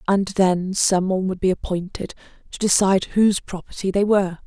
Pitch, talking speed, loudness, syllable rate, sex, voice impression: 190 Hz, 175 wpm, -20 LUFS, 5.7 syllables/s, female, slightly feminine, very adult-like, slightly muffled, slightly kind